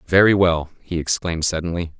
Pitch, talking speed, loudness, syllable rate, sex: 85 Hz, 150 wpm, -20 LUFS, 5.9 syllables/s, male